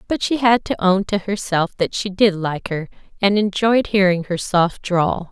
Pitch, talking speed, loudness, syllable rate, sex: 195 Hz, 205 wpm, -18 LUFS, 4.4 syllables/s, female